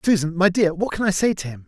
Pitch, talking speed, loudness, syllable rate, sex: 180 Hz, 320 wpm, -20 LUFS, 6.5 syllables/s, male